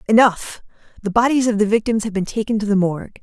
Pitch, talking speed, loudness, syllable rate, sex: 215 Hz, 225 wpm, -18 LUFS, 6.6 syllables/s, female